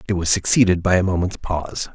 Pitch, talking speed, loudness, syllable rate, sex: 90 Hz, 215 wpm, -19 LUFS, 6.3 syllables/s, male